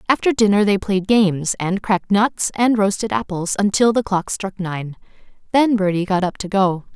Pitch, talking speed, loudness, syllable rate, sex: 200 Hz, 190 wpm, -18 LUFS, 4.9 syllables/s, female